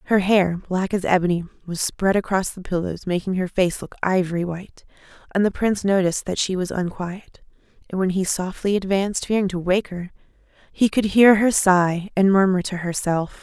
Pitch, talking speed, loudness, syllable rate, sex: 190 Hz, 190 wpm, -21 LUFS, 5.3 syllables/s, female